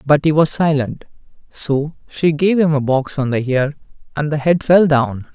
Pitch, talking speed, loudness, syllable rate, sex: 150 Hz, 200 wpm, -16 LUFS, 4.4 syllables/s, male